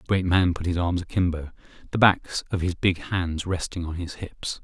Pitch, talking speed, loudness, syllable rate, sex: 90 Hz, 220 wpm, -25 LUFS, 5.1 syllables/s, male